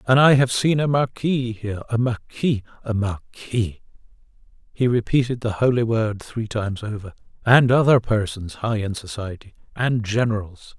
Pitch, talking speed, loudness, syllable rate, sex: 115 Hz, 140 wpm, -21 LUFS, 4.7 syllables/s, male